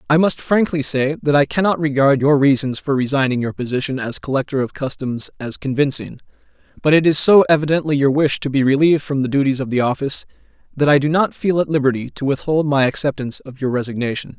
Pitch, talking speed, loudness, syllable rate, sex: 140 Hz, 210 wpm, -17 LUFS, 6.2 syllables/s, male